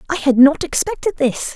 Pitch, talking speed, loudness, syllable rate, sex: 300 Hz, 195 wpm, -16 LUFS, 5.4 syllables/s, female